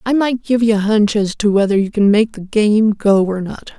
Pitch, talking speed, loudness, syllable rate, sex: 210 Hz, 270 wpm, -15 LUFS, 5.0 syllables/s, female